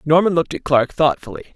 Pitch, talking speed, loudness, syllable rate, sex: 155 Hz, 195 wpm, -18 LUFS, 6.5 syllables/s, male